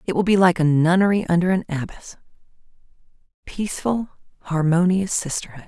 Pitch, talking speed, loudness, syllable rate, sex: 175 Hz, 125 wpm, -20 LUFS, 6.1 syllables/s, female